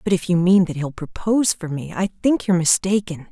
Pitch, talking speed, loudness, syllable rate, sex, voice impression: 180 Hz, 235 wpm, -20 LUFS, 5.7 syllables/s, female, very feminine, adult-like, slightly middle-aged, slightly thin, slightly tensed, powerful, slightly bright, very hard, very clear, very fluent, cool, very intellectual, refreshing, very sincere, calm, slightly friendly, very reassuring, very elegant, slightly sweet, lively, strict, slightly intense, very sharp